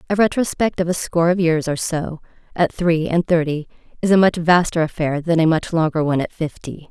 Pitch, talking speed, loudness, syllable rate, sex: 165 Hz, 215 wpm, -18 LUFS, 5.6 syllables/s, female